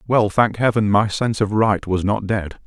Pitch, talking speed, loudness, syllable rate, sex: 105 Hz, 225 wpm, -19 LUFS, 4.9 syllables/s, male